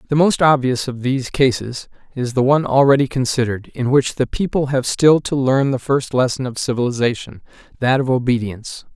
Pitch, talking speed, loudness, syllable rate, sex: 130 Hz, 180 wpm, -17 LUFS, 5.6 syllables/s, male